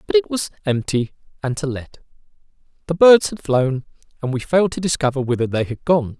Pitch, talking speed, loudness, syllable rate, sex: 150 Hz, 195 wpm, -19 LUFS, 5.7 syllables/s, male